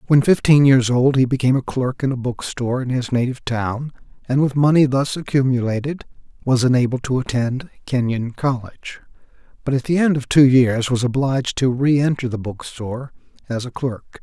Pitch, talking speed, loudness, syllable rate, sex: 130 Hz, 185 wpm, -19 LUFS, 5.4 syllables/s, male